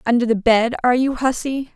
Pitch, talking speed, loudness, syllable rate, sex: 245 Hz, 205 wpm, -18 LUFS, 5.8 syllables/s, female